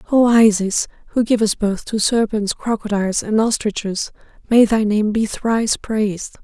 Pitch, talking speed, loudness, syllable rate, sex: 215 Hz, 150 wpm, -18 LUFS, 4.8 syllables/s, female